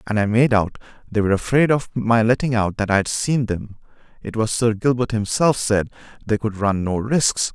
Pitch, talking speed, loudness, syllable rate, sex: 115 Hz, 200 wpm, -20 LUFS, 4.9 syllables/s, male